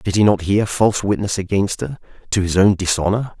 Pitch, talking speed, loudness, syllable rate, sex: 100 Hz, 210 wpm, -18 LUFS, 5.7 syllables/s, male